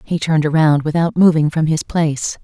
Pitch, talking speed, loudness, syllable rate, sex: 155 Hz, 195 wpm, -15 LUFS, 5.6 syllables/s, female